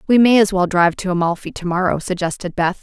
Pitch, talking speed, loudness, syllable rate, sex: 185 Hz, 235 wpm, -17 LUFS, 6.4 syllables/s, female